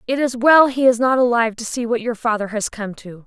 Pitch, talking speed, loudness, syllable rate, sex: 235 Hz, 275 wpm, -17 LUFS, 5.8 syllables/s, female